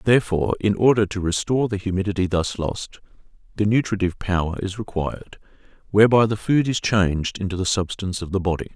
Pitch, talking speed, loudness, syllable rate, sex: 100 Hz, 170 wpm, -21 LUFS, 6.4 syllables/s, male